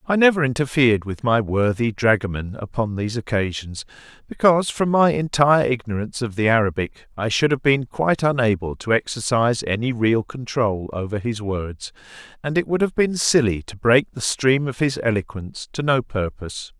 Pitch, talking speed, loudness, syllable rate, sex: 120 Hz, 170 wpm, -21 LUFS, 5.3 syllables/s, male